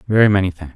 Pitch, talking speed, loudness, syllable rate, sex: 95 Hz, 240 wpm, -16 LUFS, 8.2 syllables/s, male